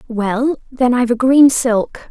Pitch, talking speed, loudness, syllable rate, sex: 245 Hz, 170 wpm, -14 LUFS, 3.9 syllables/s, female